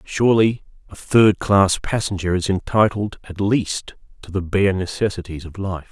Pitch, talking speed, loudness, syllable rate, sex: 95 Hz, 150 wpm, -19 LUFS, 4.6 syllables/s, male